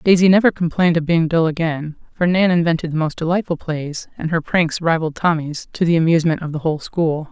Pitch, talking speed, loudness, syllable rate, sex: 165 Hz, 215 wpm, -18 LUFS, 6.0 syllables/s, female